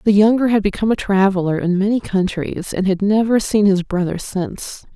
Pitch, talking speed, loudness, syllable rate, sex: 200 Hz, 195 wpm, -17 LUFS, 5.5 syllables/s, female